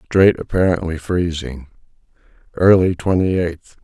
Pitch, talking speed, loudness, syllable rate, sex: 85 Hz, 95 wpm, -17 LUFS, 4.3 syllables/s, male